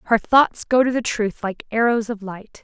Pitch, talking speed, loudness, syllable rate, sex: 225 Hz, 230 wpm, -20 LUFS, 4.6 syllables/s, female